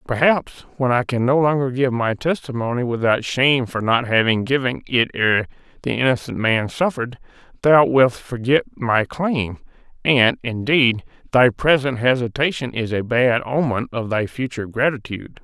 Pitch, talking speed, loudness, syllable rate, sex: 125 Hz, 150 wpm, -19 LUFS, 4.8 syllables/s, male